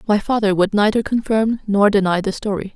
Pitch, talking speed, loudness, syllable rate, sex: 205 Hz, 195 wpm, -18 LUFS, 5.5 syllables/s, female